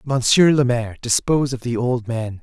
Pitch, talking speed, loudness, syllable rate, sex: 125 Hz, 200 wpm, -18 LUFS, 5.2 syllables/s, male